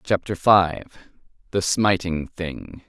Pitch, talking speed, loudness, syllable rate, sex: 90 Hz, 105 wpm, -21 LUFS, 3.0 syllables/s, male